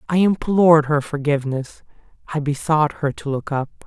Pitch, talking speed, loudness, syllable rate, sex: 150 Hz, 155 wpm, -19 LUFS, 5.0 syllables/s, male